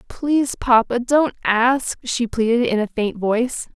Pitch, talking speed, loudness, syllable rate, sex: 240 Hz, 160 wpm, -19 LUFS, 4.1 syllables/s, female